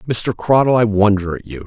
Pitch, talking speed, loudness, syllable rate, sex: 110 Hz, 215 wpm, -15 LUFS, 5.3 syllables/s, male